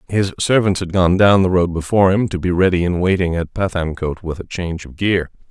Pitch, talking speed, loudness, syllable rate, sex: 90 Hz, 230 wpm, -17 LUFS, 6.0 syllables/s, male